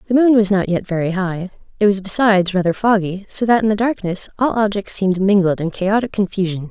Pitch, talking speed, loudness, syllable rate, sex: 200 Hz, 215 wpm, -17 LUFS, 5.9 syllables/s, female